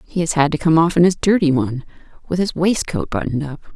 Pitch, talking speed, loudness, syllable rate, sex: 160 Hz, 240 wpm, -18 LUFS, 6.5 syllables/s, female